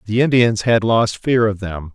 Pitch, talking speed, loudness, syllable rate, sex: 110 Hz, 215 wpm, -16 LUFS, 4.5 syllables/s, male